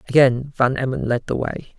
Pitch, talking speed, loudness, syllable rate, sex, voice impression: 130 Hz, 200 wpm, -20 LUFS, 5.2 syllables/s, male, very masculine, very middle-aged, very thick, tensed, slightly weak, slightly bright, slightly soft, clear, slightly fluent, slightly raspy, slightly cool, intellectual, refreshing, slightly sincere, calm, slightly mature, friendly, very reassuring, unique, elegant, slightly wild, sweet, lively, kind, slightly modest